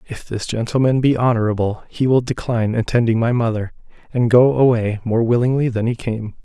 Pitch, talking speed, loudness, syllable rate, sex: 115 Hz, 175 wpm, -18 LUFS, 5.6 syllables/s, male